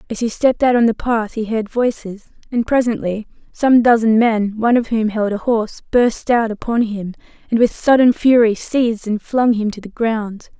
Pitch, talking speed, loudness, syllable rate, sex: 225 Hz, 205 wpm, -16 LUFS, 5.0 syllables/s, female